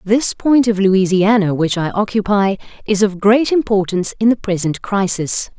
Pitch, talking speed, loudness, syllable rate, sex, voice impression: 200 Hz, 160 wpm, -15 LUFS, 4.7 syllables/s, female, very feminine, slightly middle-aged, thin, very tensed, powerful, very bright, soft, very clear, very fluent, slightly cute, cool, very intellectual, very refreshing, sincere, slightly calm, very friendly, very reassuring, unique, elegant, wild, slightly sweet, very lively, very kind, slightly intense, slightly light